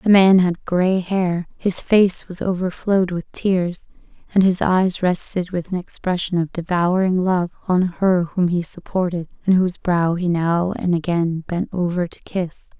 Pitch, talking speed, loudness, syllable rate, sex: 180 Hz, 175 wpm, -20 LUFS, 4.3 syllables/s, female